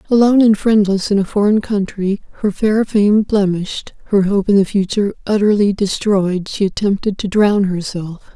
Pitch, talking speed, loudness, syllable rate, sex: 200 Hz, 165 wpm, -15 LUFS, 5.0 syllables/s, female